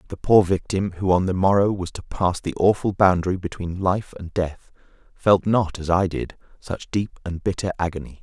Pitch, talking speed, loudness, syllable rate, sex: 90 Hz, 195 wpm, -22 LUFS, 5.0 syllables/s, male